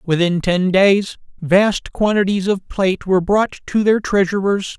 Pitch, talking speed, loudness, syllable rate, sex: 195 Hz, 150 wpm, -16 LUFS, 4.3 syllables/s, male